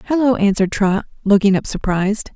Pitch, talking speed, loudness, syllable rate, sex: 210 Hz, 155 wpm, -17 LUFS, 6.2 syllables/s, female